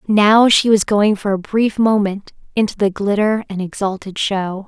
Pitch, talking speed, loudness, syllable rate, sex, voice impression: 205 Hz, 180 wpm, -16 LUFS, 4.5 syllables/s, female, very feminine, slightly young, very adult-like, thin, tensed, slightly powerful, bright, slightly soft, clear, fluent, very cute, intellectual, refreshing, very sincere, calm, friendly, reassuring, slightly unique, elegant, slightly wild, sweet, lively, slightly strict, slightly intense, modest, slightly light